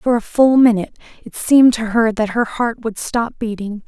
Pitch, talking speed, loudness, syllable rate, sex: 225 Hz, 215 wpm, -16 LUFS, 5.1 syllables/s, female